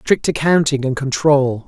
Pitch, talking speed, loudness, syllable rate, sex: 140 Hz, 145 wpm, -16 LUFS, 4.3 syllables/s, male